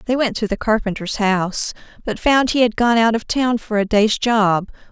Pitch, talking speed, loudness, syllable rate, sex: 220 Hz, 220 wpm, -18 LUFS, 4.9 syllables/s, female